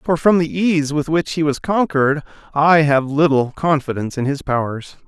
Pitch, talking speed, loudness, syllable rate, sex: 150 Hz, 190 wpm, -17 LUFS, 5.0 syllables/s, male